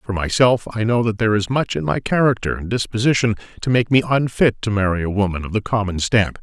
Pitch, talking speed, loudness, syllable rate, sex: 110 Hz, 235 wpm, -19 LUFS, 6.1 syllables/s, male